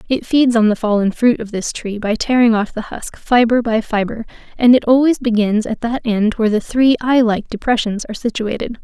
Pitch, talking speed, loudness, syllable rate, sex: 225 Hz, 215 wpm, -16 LUFS, 5.3 syllables/s, female